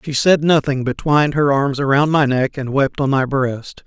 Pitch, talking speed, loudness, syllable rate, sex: 140 Hz, 235 wpm, -16 LUFS, 4.8 syllables/s, male